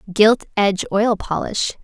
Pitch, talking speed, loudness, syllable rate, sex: 205 Hz, 130 wpm, -18 LUFS, 4.5 syllables/s, female